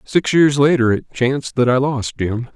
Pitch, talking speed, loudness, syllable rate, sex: 130 Hz, 210 wpm, -17 LUFS, 4.7 syllables/s, male